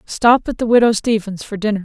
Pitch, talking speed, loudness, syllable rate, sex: 220 Hz, 230 wpm, -16 LUFS, 5.8 syllables/s, female